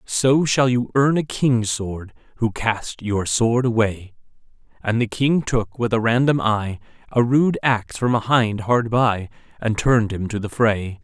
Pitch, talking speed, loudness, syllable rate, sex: 115 Hz, 185 wpm, -20 LUFS, 4.1 syllables/s, male